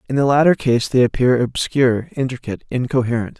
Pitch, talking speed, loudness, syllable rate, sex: 125 Hz, 160 wpm, -18 LUFS, 6.1 syllables/s, male